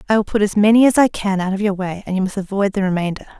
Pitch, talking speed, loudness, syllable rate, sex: 200 Hz, 320 wpm, -17 LUFS, 7.2 syllables/s, female